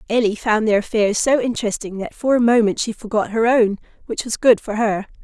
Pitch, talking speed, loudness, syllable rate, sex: 220 Hz, 205 wpm, -18 LUFS, 5.6 syllables/s, female